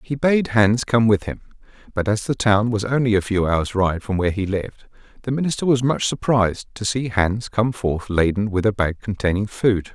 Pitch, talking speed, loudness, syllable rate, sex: 105 Hz, 215 wpm, -20 LUFS, 5.2 syllables/s, male